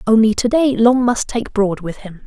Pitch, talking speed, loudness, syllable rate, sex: 225 Hz, 240 wpm, -16 LUFS, 4.7 syllables/s, female